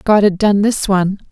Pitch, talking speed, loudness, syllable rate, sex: 200 Hz, 230 wpm, -14 LUFS, 5.3 syllables/s, female